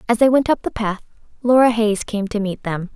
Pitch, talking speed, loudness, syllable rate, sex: 220 Hz, 245 wpm, -18 LUFS, 5.5 syllables/s, female